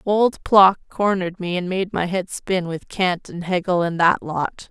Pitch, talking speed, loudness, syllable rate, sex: 180 Hz, 205 wpm, -20 LUFS, 4.2 syllables/s, female